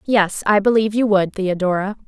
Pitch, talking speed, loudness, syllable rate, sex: 200 Hz, 175 wpm, -18 LUFS, 5.4 syllables/s, female